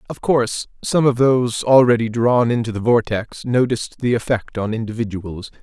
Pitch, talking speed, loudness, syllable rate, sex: 115 Hz, 160 wpm, -18 LUFS, 5.2 syllables/s, male